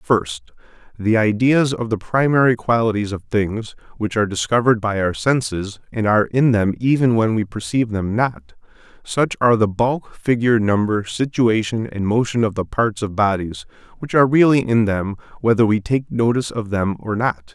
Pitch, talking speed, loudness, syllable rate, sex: 110 Hz, 180 wpm, -18 LUFS, 5.1 syllables/s, male